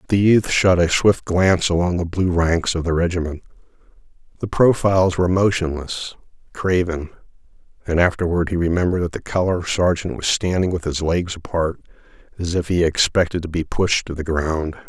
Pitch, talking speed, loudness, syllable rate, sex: 85 Hz, 170 wpm, -19 LUFS, 5.3 syllables/s, male